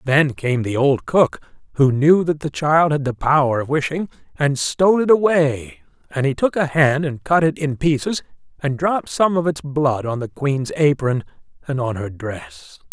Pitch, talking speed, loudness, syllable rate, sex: 145 Hz, 200 wpm, -19 LUFS, 4.6 syllables/s, male